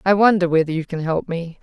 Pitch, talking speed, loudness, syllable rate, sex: 175 Hz, 260 wpm, -19 LUFS, 5.9 syllables/s, female